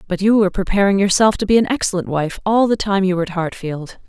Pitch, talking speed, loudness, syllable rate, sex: 190 Hz, 250 wpm, -17 LUFS, 6.6 syllables/s, female